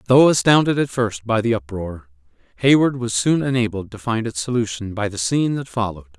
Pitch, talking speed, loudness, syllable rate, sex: 115 Hz, 195 wpm, -19 LUFS, 5.7 syllables/s, male